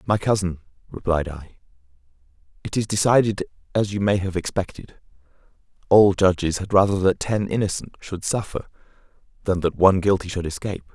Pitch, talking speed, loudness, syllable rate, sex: 95 Hz, 150 wpm, -22 LUFS, 5.6 syllables/s, male